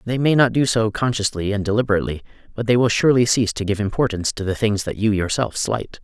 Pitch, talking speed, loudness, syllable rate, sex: 110 Hz, 230 wpm, -19 LUFS, 6.6 syllables/s, male